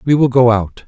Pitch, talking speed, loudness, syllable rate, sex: 125 Hz, 275 wpm, -13 LUFS, 5.3 syllables/s, male